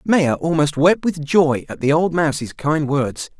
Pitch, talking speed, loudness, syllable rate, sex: 155 Hz, 195 wpm, -18 LUFS, 4.1 syllables/s, male